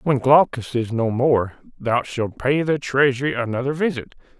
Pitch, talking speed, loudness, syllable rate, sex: 130 Hz, 165 wpm, -20 LUFS, 4.8 syllables/s, male